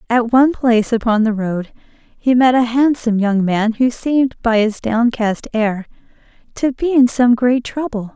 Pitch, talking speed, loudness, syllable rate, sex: 235 Hz, 175 wpm, -16 LUFS, 4.6 syllables/s, female